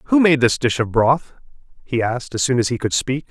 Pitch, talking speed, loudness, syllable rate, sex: 130 Hz, 255 wpm, -18 LUFS, 5.4 syllables/s, male